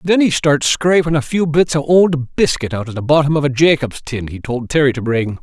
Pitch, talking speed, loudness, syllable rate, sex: 145 Hz, 255 wpm, -15 LUFS, 5.3 syllables/s, male